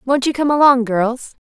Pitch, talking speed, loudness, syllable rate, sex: 255 Hz, 205 wpm, -15 LUFS, 4.8 syllables/s, female